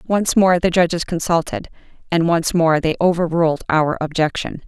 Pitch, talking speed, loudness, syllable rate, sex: 165 Hz, 155 wpm, -18 LUFS, 5.0 syllables/s, female